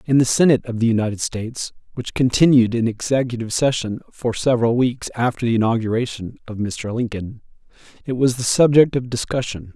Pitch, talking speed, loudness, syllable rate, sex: 120 Hz, 165 wpm, -19 LUFS, 5.8 syllables/s, male